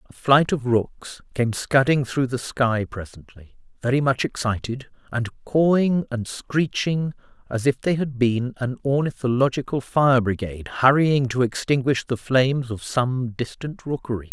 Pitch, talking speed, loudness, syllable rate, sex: 130 Hz, 145 wpm, -22 LUFS, 4.4 syllables/s, male